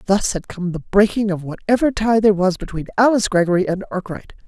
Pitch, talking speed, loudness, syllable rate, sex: 200 Hz, 200 wpm, -18 LUFS, 6.2 syllables/s, female